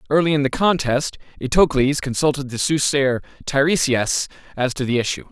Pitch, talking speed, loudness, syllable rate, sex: 140 Hz, 145 wpm, -19 LUFS, 5.3 syllables/s, male